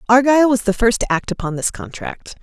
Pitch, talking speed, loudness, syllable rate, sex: 230 Hz, 225 wpm, -17 LUFS, 5.9 syllables/s, female